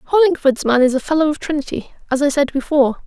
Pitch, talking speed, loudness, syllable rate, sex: 285 Hz, 215 wpm, -17 LUFS, 6.3 syllables/s, female